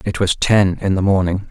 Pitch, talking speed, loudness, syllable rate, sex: 95 Hz, 240 wpm, -16 LUFS, 5.1 syllables/s, male